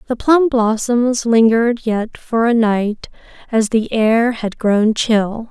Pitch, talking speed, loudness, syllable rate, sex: 230 Hz, 150 wpm, -15 LUFS, 3.5 syllables/s, female